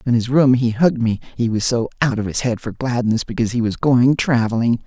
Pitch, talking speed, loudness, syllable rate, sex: 120 Hz, 260 wpm, -18 LUFS, 6.0 syllables/s, male